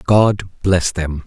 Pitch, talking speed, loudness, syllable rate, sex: 90 Hz, 140 wpm, -17 LUFS, 3.1 syllables/s, male